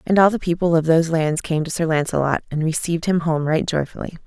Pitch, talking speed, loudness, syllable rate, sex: 165 Hz, 240 wpm, -20 LUFS, 6.2 syllables/s, female